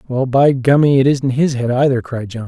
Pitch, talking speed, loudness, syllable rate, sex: 130 Hz, 240 wpm, -15 LUFS, 5.2 syllables/s, male